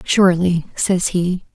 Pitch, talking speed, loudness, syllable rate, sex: 180 Hz, 115 wpm, -17 LUFS, 3.9 syllables/s, female